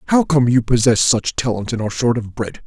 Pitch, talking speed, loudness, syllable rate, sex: 120 Hz, 245 wpm, -17 LUFS, 5.7 syllables/s, male